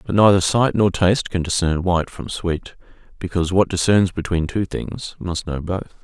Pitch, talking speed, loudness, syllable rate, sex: 90 Hz, 190 wpm, -20 LUFS, 5.0 syllables/s, male